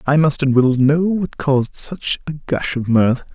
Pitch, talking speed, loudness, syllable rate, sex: 140 Hz, 215 wpm, -17 LUFS, 4.3 syllables/s, male